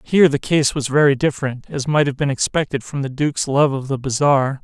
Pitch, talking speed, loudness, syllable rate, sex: 140 Hz, 235 wpm, -18 LUFS, 6.0 syllables/s, male